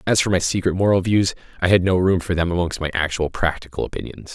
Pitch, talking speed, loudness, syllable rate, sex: 90 Hz, 235 wpm, -20 LUFS, 6.3 syllables/s, male